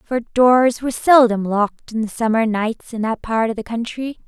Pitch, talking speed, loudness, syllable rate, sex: 230 Hz, 210 wpm, -18 LUFS, 4.8 syllables/s, female